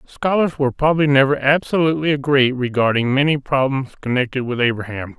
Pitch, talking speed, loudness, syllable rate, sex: 135 Hz, 140 wpm, -18 LUFS, 5.7 syllables/s, male